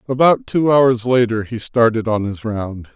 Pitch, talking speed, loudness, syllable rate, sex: 120 Hz, 185 wpm, -16 LUFS, 4.4 syllables/s, male